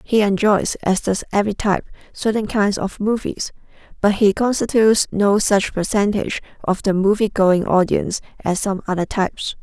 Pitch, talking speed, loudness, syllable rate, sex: 200 Hz, 155 wpm, -19 LUFS, 5.2 syllables/s, female